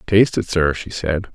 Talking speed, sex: 225 wpm, male